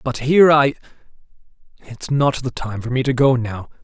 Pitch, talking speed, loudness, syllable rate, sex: 130 Hz, 190 wpm, -17 LUFS, 5.2 syllables/s, male